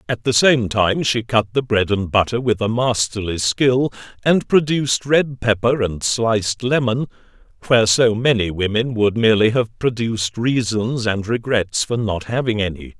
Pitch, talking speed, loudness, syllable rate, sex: 115 Hz, 165 wpm, -18 LUFS, 4.7 syllables/s, male